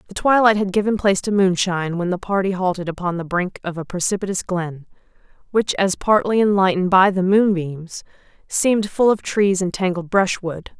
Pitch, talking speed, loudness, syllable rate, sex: 190 Hz, 180 wpm, -19 LUFS, 5.4 syllables/s, female